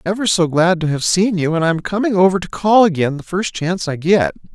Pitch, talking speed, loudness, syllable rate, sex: 175 Hz, 265 wpm, -16 LUFS, 5.9 syllables/s, male